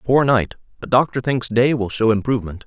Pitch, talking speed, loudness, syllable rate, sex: 115 Hz, 205 wpm, -18 LUFS, 5.6 syllables/s, male